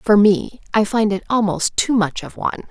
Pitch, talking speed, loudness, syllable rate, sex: 205 Hz, 220 wpm, -18 LUFS, 5.0 syllables/s, female